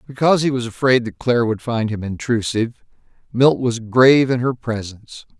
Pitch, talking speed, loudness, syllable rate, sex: 120 Hz, 180 wpm, -18 LUFS, 5.6 syllables/s, male